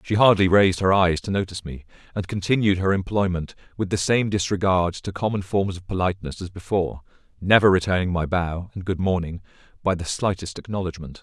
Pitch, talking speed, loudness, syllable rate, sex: 95 Hz, 180 wpm, -22 LUFS, 5.9 syllables/s, male